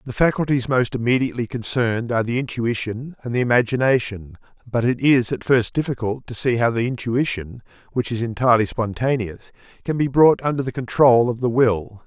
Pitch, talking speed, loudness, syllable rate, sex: 120 Hz, 175 wpm, -20 LUFS, 5.6 syllables/s, male